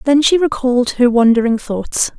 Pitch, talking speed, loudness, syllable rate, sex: 250 Hz, 165 wpm, -14 LUFS, 5.0 syllables/s, female